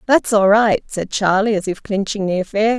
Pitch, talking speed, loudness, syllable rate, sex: 205 Hz, 215 wpm, -17 LUFS, 4.9 syllables/s, female